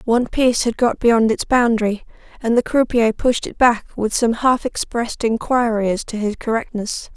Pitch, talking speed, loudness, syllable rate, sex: 230 Hz, 185 wpm, -18 LUFS, 5.0 syllables/s, female